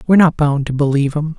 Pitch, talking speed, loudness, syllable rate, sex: 150 Hz, 260 wpm, -15 LUFS, 7.2 syllables/s, male